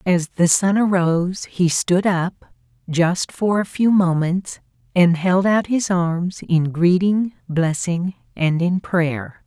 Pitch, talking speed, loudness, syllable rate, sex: 180 Hz, 145 wpm, -19 LUFS, 3.4 syllables/s, female